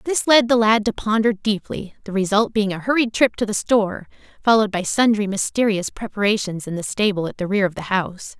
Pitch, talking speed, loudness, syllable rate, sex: 210 Hz, 215 wpm, -20 LUFS, 5.8 syllables/s, female